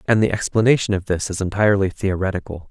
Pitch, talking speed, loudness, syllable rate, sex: 95 Hz, 180 wpm, -19 LUFS, 6.6 syllables/s, male